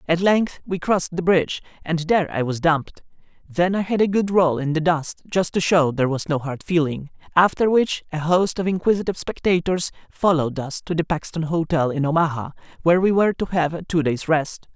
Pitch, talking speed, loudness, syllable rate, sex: 165 Hz, 210 wpm, -21 LUFS, 5.7 syllables/s, male